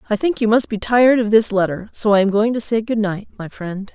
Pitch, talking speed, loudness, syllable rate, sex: 215 Hz, 290 wpm, -17 LUFS, 5.8 syllables/s, female